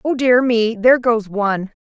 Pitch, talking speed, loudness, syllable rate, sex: 230 Hz, 195 wpm, -16 LUFS, 5.0 syllables/s, female